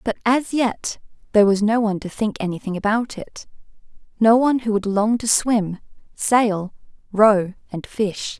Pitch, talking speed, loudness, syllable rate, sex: 215 Hz, 165 wpm, -20 LUFS, 4.6 syllables/s, female